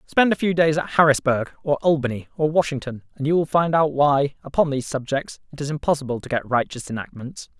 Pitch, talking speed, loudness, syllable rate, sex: 145 Hz, 205 wpm, -21 LUFS, 6.0 syllables/s, male